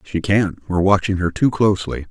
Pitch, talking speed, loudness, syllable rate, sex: 95 Hz, 170 wpm, -18 LUFS, 5.5 syllables/s, male